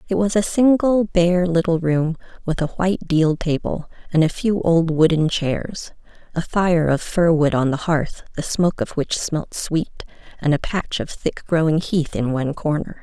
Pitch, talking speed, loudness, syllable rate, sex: 170 Hz, 195 wpm, -20 LUFS, 4.6 syllables/s, female